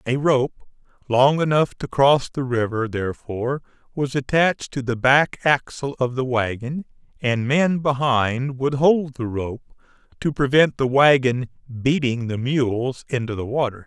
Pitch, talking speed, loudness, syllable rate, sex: 130 Hz, 150 wpm, -21 LUFS, 4.3 syllables/s, male